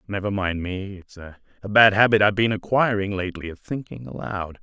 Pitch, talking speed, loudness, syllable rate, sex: 100 Hz, 180 wpm, -21 LUFS, 5.8 syllables/s, male